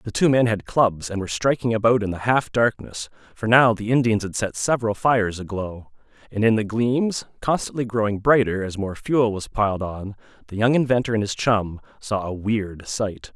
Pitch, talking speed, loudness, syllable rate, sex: 110 Hz, 200 wpm, -22 LUFS, 5.1 syllables/s, male